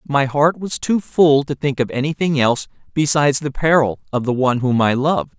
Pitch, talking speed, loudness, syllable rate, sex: 140 Hz, 210 wpm, -17 LUFS, 5.7 syllables/s, male